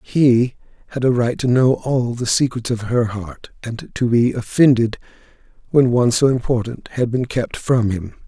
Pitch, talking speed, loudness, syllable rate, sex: 120 Hz, 180 wpm, -18 LUFS, 4.5 syllables/s, male